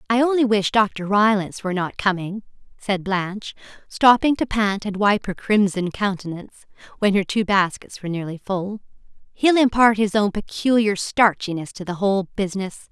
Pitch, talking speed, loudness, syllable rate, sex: 200 Hz, 165 wpm, -20 LUFS, 5.2 syllables/s, female